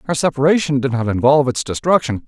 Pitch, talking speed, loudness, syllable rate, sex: 140 Hz, 185 wpm, -16 LUFS, 6.6 syllables/s, male